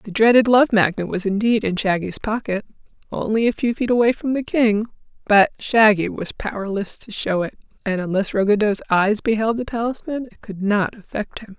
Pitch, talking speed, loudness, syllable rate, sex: 215 Hz, 185 wpm, -20 LUFS, 5.2 syllables/s, female